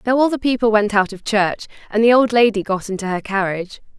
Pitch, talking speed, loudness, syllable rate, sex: 215 Hz, 240 wpm, -17 LUFS, 6.0 syllables/s, female